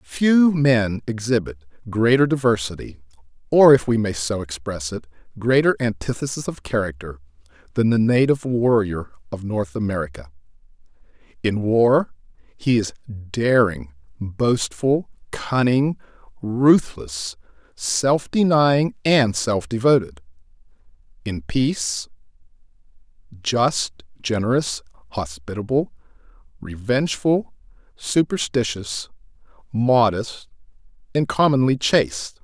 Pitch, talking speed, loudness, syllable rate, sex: 115 Hz, 85 wpm, -20 LUFS, 4.0 syllables/s, male